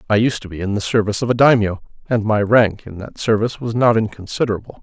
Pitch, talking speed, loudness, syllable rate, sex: 110 Hz, 235 wpm, -18 LUFS, 6.6 syllables/s, male